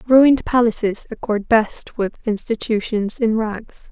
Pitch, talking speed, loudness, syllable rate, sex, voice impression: 225 Hz, 125 wpm, -19 LUFS, 4.1 syllables/s, female, feminine, adult-like, slightly soft, calm, slightly friendly, reassuring, slightly sweet, kind